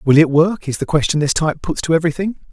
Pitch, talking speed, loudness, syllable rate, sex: 160 Hz, 260 wpm, -17 LUFS, 6.7 syllables/s, male